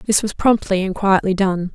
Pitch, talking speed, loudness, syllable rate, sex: 195 Hz, 205 wpm, -18 LUFS, 5.0 syllables/s, female